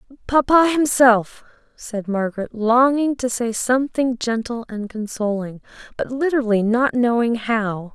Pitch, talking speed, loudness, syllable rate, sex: 235 Hz, 120 wpm, -19 LUFS, 4.5 syllables/s, female